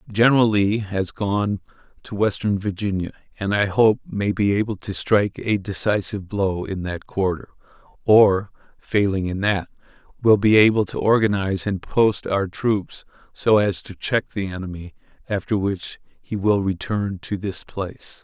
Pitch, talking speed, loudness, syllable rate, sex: 100 Hz, 160 wpm, -21 LUFS, 4.6 syllables/s, male